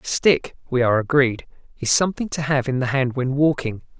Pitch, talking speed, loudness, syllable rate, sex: 135 Hz, 210 wpm, -20 LUFS, 5.7 syllables/s, male